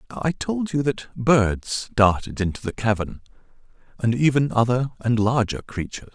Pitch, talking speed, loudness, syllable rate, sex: 120 Hz, 145 wpm, -22 LUFS, 4.6 syllables/s, male